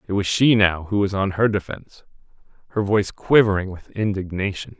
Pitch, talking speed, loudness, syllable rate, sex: 100 Hz, 175 wpm, -20 LUFS, 5.7 syllables/s, male